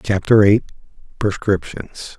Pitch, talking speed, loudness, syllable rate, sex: 100 Hz, 80 wpm, -17 LUFS, 3.9 syllables/s, male